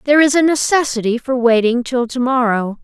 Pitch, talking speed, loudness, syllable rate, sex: 250 Hz, 190 wpm, -15 LUFS, 5.5 syllables/s, female